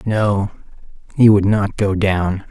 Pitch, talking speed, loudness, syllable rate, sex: 100 Hz, 145 wpm, -16 LUFS, 3.5 syllables/s, male